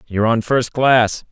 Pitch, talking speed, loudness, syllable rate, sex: 115 Hz, 135 wpm, -16 LUFS, 4.4 syllables/s, male